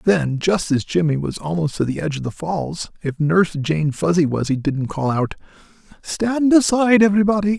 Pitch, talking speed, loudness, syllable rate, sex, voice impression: 165 Hz, 180 wpm, -19 LUFS, 5.2 syllables/s, male, masculine, middle-aged, relaxed, bright, muffled, very raspy, calm, mature, friendly, wild, slightly lively, slightly strict